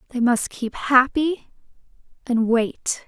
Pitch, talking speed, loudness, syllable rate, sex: 250 Hz, 115 wpm, -21 LUFS, 3.4 syllables/s, female